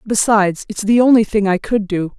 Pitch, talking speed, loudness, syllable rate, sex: 210 Hz, 220 wpm, -15 LUFS, 5.5 syllables/s, female